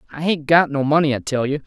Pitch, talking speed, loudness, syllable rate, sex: 145 Hz, 290 wpm, -18 LUFS, 6.5 syllables/s, male